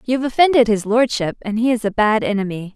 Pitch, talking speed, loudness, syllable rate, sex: 225 Hz, 215 wpm, -17 LUFS, 6.1 syllables/s, female